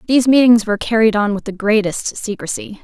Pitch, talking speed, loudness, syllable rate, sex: 215 Hz, 190 wpm, -15 LUFS, 6.0 syllables/s, female